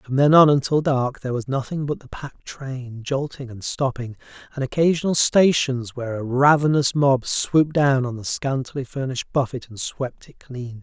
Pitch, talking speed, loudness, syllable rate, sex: 135 Hz, 185 wpm, -21 LUFS, 5.0 syllables/s, male